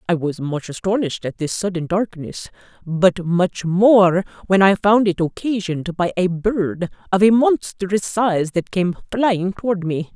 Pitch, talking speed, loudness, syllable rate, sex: 185 Hz, 165 wpm, -19 LUFS, 4.3 syllables/s, female